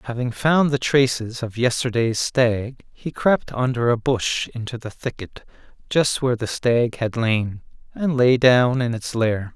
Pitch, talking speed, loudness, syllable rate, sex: 120 Hz, 170 wpm, -21 LUFS, 4.1 syllables/s, male